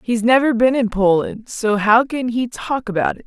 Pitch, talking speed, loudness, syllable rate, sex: 235 Hz, 220 wpm, -17 LUFS, 4.7 syllables/s, female